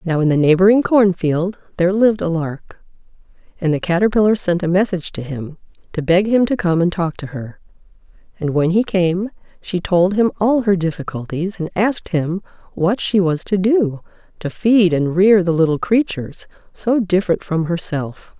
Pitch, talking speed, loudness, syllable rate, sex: 180 Hz, 185 wpm, -17 LUFS, 5.0 syllables/s, female